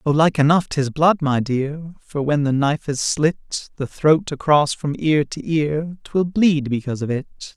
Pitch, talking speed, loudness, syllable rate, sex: 150 Hz, 200 wpm, -20 LUFS, 4.3 syllables/s, male